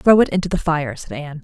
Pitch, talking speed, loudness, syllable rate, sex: 160 Hz, 290 wpm, -19 LUFS, 6.5 syllables/s, female